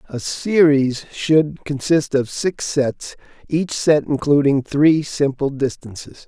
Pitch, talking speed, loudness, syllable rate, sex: 145 Hz, 125 wpm, -18 LUFS, 3.5 syllables/s, male